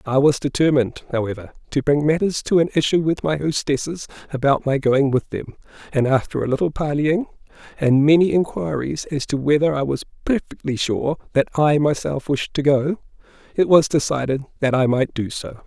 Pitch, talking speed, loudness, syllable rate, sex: 145 Hz, 180 wpm, -20 LUFS, 5.3 syllables/s, male